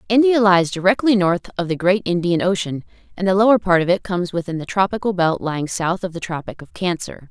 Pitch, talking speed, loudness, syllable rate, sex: 185 Hz, 220 wpm, -19 LUFS, 6.0 syllables/s, female